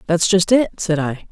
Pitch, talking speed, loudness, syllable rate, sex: 180 Hz, 230 wpm, -17 LUFS, 4.4 syllables/s, female